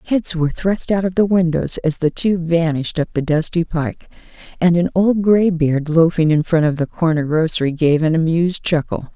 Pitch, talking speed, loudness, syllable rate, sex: 165 Hz, 195 wpm, -17 LUFS, 5.2 syllables/s, female